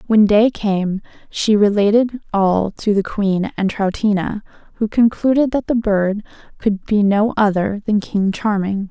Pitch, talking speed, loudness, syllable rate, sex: 205 Hz, 155 wpm, -17 LUFS, 4.1 syllables/s, female